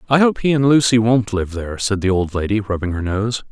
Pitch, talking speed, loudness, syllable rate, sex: 110 Hz, 255 wpm, -17 LUFS, 5.8 syllables/s, male